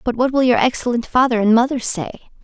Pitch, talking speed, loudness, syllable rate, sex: 245 Hz, 220 wpm, -17 LUFS, 6.4 syllables/s, female